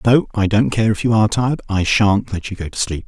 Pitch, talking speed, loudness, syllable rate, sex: 105 Hz, 290 wpm, -17 LUFS, 6.0 syllables/s, male